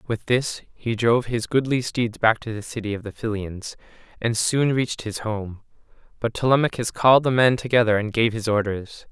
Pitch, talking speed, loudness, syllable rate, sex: 115 Hz, 190 wpm, -22 LUFS, 5.2 syllables/s, male